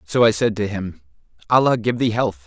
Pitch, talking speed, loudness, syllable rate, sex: 110 Hz, 220 wpm, -19 LUFS, 5.4 syllables/s, male